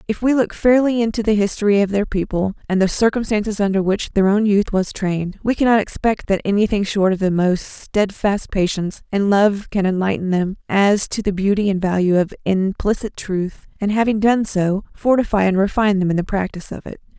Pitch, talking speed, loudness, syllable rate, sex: 200 Hz, 205 wpm, -18 LUFS, 5.5 syllables/s, female